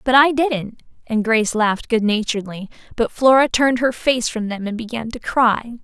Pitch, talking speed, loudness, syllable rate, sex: 235 Hz, 195 wpm, -18 LUFS, 5.2 syllables/s, female